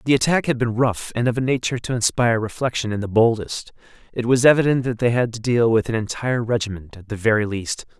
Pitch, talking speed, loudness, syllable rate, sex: 120 Hz, 235 wpm, -20 LUFS, 6.3 syllables/s, male